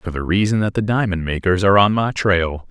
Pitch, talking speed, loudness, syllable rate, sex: 95 Hz, 245 wpm, -17 LUFS, 5.6 syllables/s, male